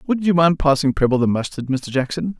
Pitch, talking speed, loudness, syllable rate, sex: 150 Hz, 225 wpm, -19 LUFS, 5.8 syllables/s, male